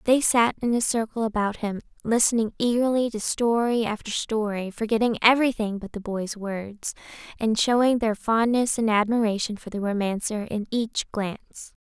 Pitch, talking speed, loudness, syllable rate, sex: 220 Hz, 155 wpm, -24 LUFS, 5.0 syllables/s, female